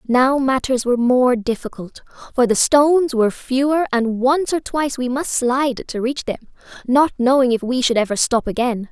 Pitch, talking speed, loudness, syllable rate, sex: 255 Hz, 190 wpm, -18 LUFS, 5.0 syllables/s, female